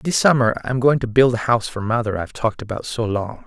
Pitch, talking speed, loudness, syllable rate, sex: 120 Hz, 260 wpm, -19 LUFS, 6.3 syllables/s, male